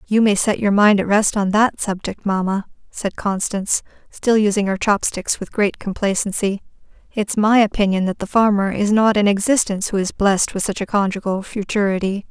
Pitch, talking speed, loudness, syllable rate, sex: 205 Hz, 185 wpm, -18 LUFS, 5.3 syllables/s, female